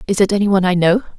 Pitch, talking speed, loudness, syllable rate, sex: 195 Hz, 255 wpm, -15 LUFS, 7.8 syllables/s, female